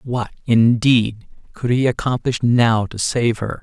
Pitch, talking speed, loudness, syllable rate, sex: 115 Hz, 150 wpm, -18 LUFS, 3.8 syllables/s, male